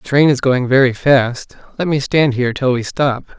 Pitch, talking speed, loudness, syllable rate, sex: 130 Hz, 230 wpm, -15 LUFS, 5.0 syllables/s, male